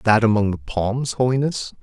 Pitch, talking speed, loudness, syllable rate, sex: 110 Hz, 165 wpm, -20 LUFS, 4.6 syllables/s, male